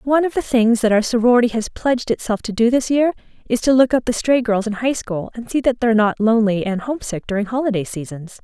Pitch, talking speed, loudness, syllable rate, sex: 230 Hz, 255 wpm, -18 LUFS, 6.5 syllables/s, female